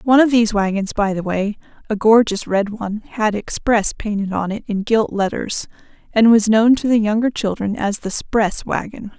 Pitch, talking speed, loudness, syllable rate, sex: 215 Hz, 195 wpm, -18 LUFS, 4.9 syllables/s, female